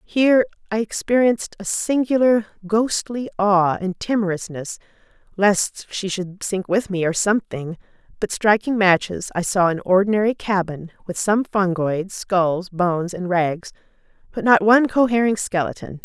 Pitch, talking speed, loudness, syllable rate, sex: 200 Hz, 140 wpm, -20 LUFS, 4.6 syllables/s, female